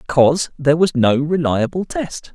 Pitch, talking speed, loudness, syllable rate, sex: 150 Hz, 155 wpm, -17 LUFS, 5.1 syllables/s, male